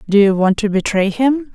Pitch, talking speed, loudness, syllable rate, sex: 215 Hz, 235 wpm, -15 LUFS, 5.2 syllables/s, female